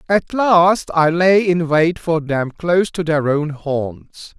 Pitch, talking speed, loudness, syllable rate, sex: 165 Hz, 180 wpm, -16 LUFS, 3.4 syllables/s, male